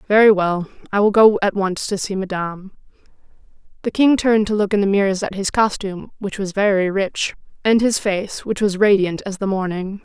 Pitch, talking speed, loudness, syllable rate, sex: 200 Hz, 205 wpm, -18 LUFS, 5.4 syllables/s, female